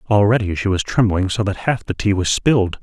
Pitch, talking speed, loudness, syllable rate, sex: 100 Hz, 235 wpm, -18 LUFS, 5.6 syllables/s, male